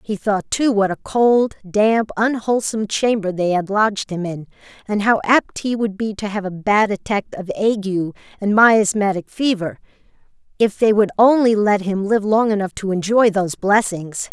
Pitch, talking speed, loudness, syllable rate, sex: 205 Hz, 180 wpm, -18 LUFS, 4.7 syllables/s, female